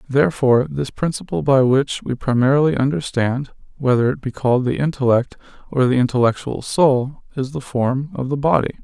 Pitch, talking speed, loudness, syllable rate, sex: 135 Hz, 165 wpm, -19 LUFS, 5.4 syllables/s, male